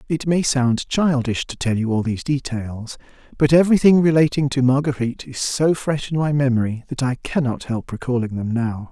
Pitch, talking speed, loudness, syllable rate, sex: 135 Hz, 195 wpm, -20 LUFS, 5.3 syllables/s, male